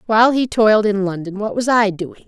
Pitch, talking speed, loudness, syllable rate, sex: 215 Hz, 235 wpm, -16 LUFS, 5.7 syllables/s, female